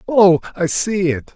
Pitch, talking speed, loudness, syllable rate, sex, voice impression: 180 Hz, 180 wpm, -16 LUFS, 3.9 syllables/s, male, masculine, adult-like, thick, slightly relaxed, slightly powerful, slightly weak, slightly muffled, raspy, intellectual, calm, friendly, reassuring, slightly wild, slightly lively, kind, slightly modest